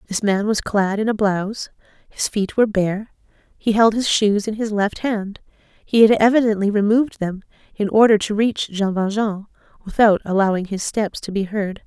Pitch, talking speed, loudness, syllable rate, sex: 210 Hz, 185 wpm, -19 LUFS, 5.0 syllables/s, female